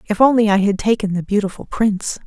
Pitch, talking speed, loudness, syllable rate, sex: 205 Hz, 210 wpm, -17 LUFS, 6.2 syllables/s, female